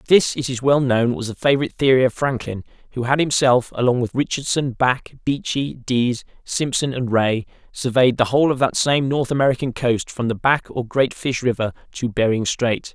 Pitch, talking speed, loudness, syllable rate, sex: 125 Hz, 195 wpm, -20 LUFS, 5.2 syllables/s, male